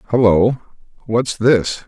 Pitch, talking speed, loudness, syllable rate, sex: 115 Hz, 95 wpm, -16 LUFS, 3.5 syllables/s, male